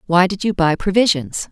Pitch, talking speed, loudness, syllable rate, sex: 185 Hz, 200 wpm, -17 LUFS, 5.2 syllables/s, female